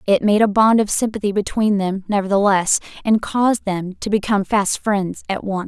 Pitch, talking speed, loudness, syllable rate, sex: 205 Hz, 190 wpm, -18 LUFS, 5.2 syllables/s, female